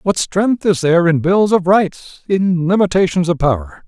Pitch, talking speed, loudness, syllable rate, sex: 175 Hz, 170 wpm, -15 LUFS, 4.5 syllables/s, male